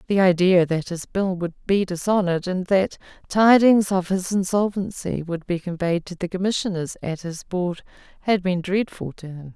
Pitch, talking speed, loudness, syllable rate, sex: 185 Hz, 175 wpm, -22 LUFS, 4.8 syllables/s, female